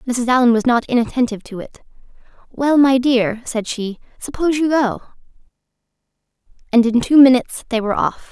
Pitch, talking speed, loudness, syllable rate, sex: 245 Hz, 160 wpm, -16 LUFS, 5.8 syllables/s, female